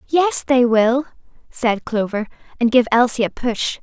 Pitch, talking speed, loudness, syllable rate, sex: 245 Hz, 155 wpm, -18 LUFS, 4.2 syllables/s, female